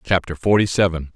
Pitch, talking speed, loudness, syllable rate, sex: 90 Hz, 155 wpm, -19 LUFS, 5.8 syllables/s, male